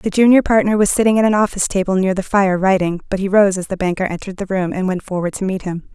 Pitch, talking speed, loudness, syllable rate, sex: 195 Hz, 285 wpm, -16 LUFS, 6.7 syllables/s, female